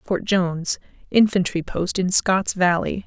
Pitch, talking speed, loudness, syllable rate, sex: 185 Hz, 115 wpm, -21 LUFS, 4.2 syllables/s, female